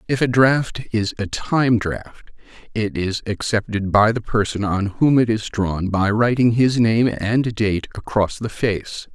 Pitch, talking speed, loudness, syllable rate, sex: 110 Hz, 175 wpm, -19 LUFS, 3.8 syllables/s, male